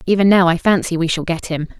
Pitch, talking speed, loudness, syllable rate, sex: 175 Hz, 270 wpm, -16 LUFS, 6.3 syllables/s, female